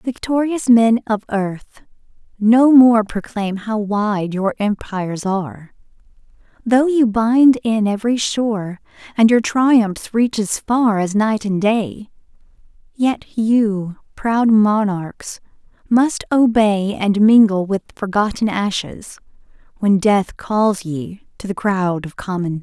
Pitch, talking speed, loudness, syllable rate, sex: 215 Hz, 130 wpm, -17 LUFS, 3.5 syllables/s, female